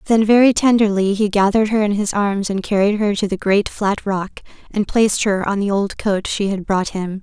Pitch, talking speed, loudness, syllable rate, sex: 205 Hz, 230 wpm, -17 LUFS, 5.3 syllables/s, female